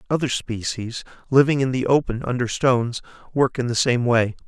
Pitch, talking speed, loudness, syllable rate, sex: 125 Hz, 175 wpm, -21 LUFS, 5.3 syllables/s, male